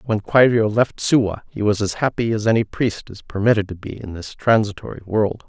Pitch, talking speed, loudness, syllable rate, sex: 105 Hz, 210 wpm, -19 LUFS, 5.4 syllables/s, male